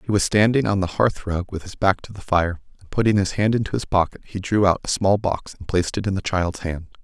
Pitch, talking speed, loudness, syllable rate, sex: 95 Hz, 275 wpm, -22 LUFS, 5.9 syllables/s, male